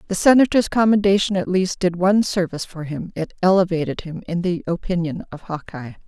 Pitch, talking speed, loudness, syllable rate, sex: 180 Hz, 180 wpm, -20 LUFS, 5.8 syllables/s, female